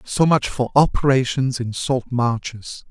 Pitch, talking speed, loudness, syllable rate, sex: 125 Hz, 145 wpm, -20 LUFS, 4.1 syllables/s, male